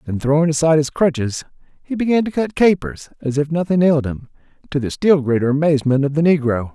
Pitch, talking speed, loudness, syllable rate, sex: 150 Hz, 205 wpm, -17 LUFS, 6.3 syllables/s, male